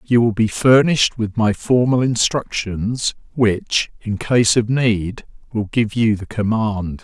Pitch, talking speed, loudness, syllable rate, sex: 110 Hz, 155 wpm, -18 LUFS, 3.8 syllables/s, male